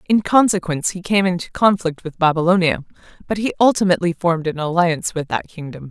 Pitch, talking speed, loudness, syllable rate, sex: 175 Hz, 175 wpm, -18 LUFS, 6.2 syllables/s, female